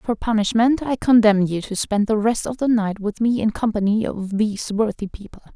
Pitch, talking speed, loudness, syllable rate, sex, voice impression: 215 Hz, 215 wpm, -20 LUFS, 5.2 syllables/s, female, very feminine, slightly young, slightly adult-like, very thin, tensed, slightly weak, slightly bright, slightly soft, slightly muffled, fluent, slightly raspy, very cute, intellectual, very refreshing, sincere, calm, very friendly, very reassuring, unique, very elegant, slightly wild, sweet, lively, kind, slightly sharp, slightly modest, light